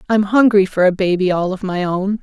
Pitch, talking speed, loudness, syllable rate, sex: 195 Hz, 240 wpm, -16 LUFS, 5.4 syllables/s, female